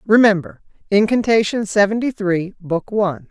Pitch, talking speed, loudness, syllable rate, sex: 205 Hz, 110 wpm, -17 LUFS, 4.9 syllables/s, female